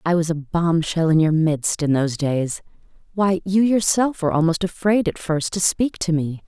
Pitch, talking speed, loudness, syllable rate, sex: 170 Hz, 215 wpm, -20 LUFS, 4.8 syllables/s, female